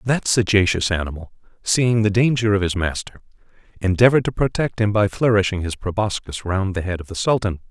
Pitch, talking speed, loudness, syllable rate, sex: 105 Hz, 180 wpm, -20 LUFS, 5.7 syllables/s, male